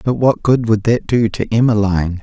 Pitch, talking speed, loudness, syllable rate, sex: 110 Hz, 215 wpm, -15 LUFS, 5.2 syllables/s, male